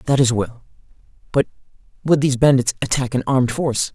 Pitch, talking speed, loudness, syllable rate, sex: 130 Hz, 165 wpm, -19 LUFS, 6.2 syllables/s, male